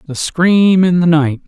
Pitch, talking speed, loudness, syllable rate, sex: 170 Hz, 205 wpm, -12 LUFS, 3.9 syllables/s, male